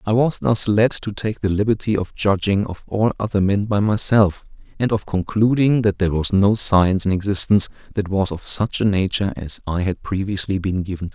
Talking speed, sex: 215 wpm, male